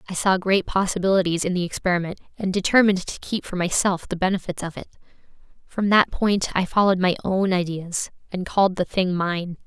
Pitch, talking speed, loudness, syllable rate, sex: 185 Hz, 185 wpm, -22 LUFS, 5.9 syllables/s, female